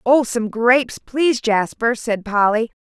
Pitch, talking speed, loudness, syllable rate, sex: 235 Hz, 150 wpm, -18 LUFS, 4.2 syllables/s, female